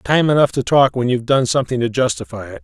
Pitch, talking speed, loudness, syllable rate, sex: 125 Hz, 250 wpm, -16 LUFS, 6.6 syllables/s, male